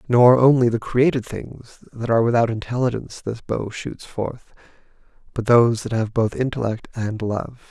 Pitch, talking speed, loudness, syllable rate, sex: 115 Hz, 165 wpm, -20 LUFS, 4.9 syllables/s, male